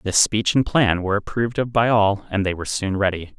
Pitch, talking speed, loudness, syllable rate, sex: 105 Hz, 250 wpm, -20 LUFS, 5.9 syllables/s, male